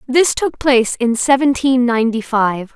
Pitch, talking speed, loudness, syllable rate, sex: 250 Hz, 155 wpm, -15 LUFS, 4.6 syllables/s, female